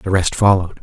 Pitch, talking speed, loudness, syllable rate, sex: 95 Hz, 220 wpm, -15 LUFS, 6.3 syllables/s, male